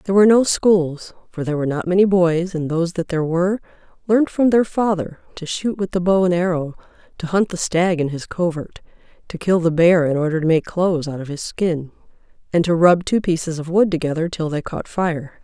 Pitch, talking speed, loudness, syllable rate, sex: 175 Hz, 225 wpm, -19 LUFS, 5.7 syllables/s, female